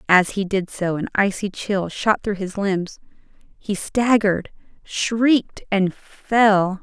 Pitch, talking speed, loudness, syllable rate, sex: 200 Hz, 140 wpm, -20 LUFS, 3.5 syllables/s, female